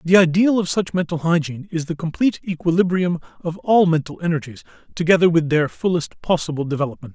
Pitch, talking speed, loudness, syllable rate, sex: 170 Hz, 170 wpm, -20 LUFS, 6.1 syllables/s, male